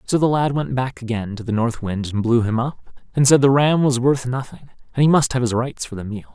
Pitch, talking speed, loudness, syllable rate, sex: 125 Hz, 285 wpm, -19 LUFS, 5.6 syllables/s, male